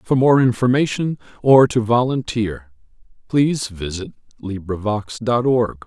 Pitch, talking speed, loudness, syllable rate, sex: 115 Hz, 115 wpm, -18 LUFS, 4.3 syllables/s, male